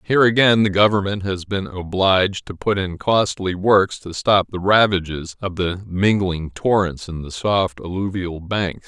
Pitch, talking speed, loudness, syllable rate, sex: 95 Hz, 170 wpm, -19 LUFS, 4.4 syllables/s, male